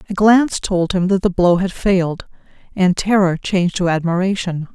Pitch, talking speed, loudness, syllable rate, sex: 185 Hz, 175 wpm, -16 LUFS, 5.2 syllables/s, female